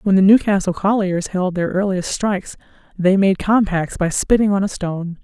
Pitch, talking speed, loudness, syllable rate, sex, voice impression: 190 Hz, 185 wpm, -17 LUFS, 5.1 syllables/s, female, feminine, very adult-like, slightly muffled, calm, sweet, slightly kind